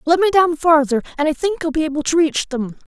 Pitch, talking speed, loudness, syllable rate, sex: 310 Hz, 265 wpm, -17 LUFS, 5.9 syllables/s, female